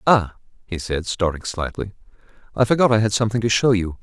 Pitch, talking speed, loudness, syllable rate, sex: 105 Hz, 195 wpm, -20 LUFS, 6.2 syllables/s, male